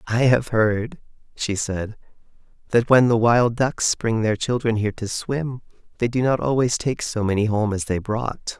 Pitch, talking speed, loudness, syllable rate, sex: 115 Hz, 190 wpm, -21 LUFS, 4.4 syllables/s, male